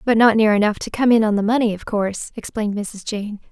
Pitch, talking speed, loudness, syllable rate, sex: 215 Hz, 255 wpm, -19 LUFS, 6.1 syllables/s, female